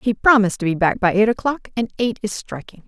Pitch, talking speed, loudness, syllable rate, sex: 210 Hz, 250 wpm, -19 LUFS, 6.1 syllables/s, female